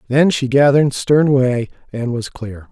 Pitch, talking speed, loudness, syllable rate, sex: 130 Hz, 175 wpm, -15 LUFS, 4.4 syllables/s, male